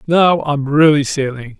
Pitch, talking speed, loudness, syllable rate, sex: 145 Hz, 150 wpm, -14 LUFS, 4.2 syllables/s, male